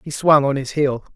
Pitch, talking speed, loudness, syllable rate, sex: 140 Hz, 260 wpm, -18 LUFS, 5.2 syllables/s, male